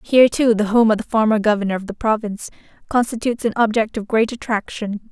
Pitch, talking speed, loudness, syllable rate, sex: 220 Hz, 200 wpm, -18 LUFS, 6.4 syllables/s, female